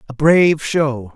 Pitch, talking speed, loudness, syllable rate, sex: 145 Hz, 155 wpm, -15 LUFS, 4.1 syllables/s, male